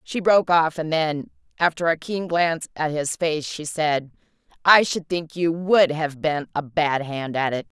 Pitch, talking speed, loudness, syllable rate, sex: 160 Hz, 200 wpm, -22 LUFS, 4.4 syllables/s, female